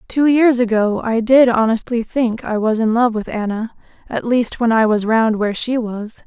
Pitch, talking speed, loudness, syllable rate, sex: 230 Hz, 200 wpm, -16 LUFS, 4.7 syllables/s, female